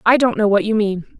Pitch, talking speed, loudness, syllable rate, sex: 215 Hz, 300 wpm, -17 LUFS, 5.5 syllables/s, female